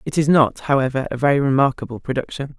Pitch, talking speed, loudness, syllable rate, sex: 135 Hz, 185 wpm, -19 LUFS, 6.6 syllables/s, female